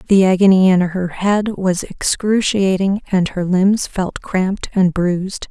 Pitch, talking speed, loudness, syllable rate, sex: 190 Hz, 150 wpm, -16 LUFS, 4.1 syllables/s, female